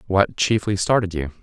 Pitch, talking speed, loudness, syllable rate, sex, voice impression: 95 Hz, 170 wpm, -20 LUFS, 5.1 syllables/s, male, masculine, adult-like, slightly relaxed, bright, clear, slightly raspy, cool, intellectual, calm, friendly, reassuring, wild, kind, modest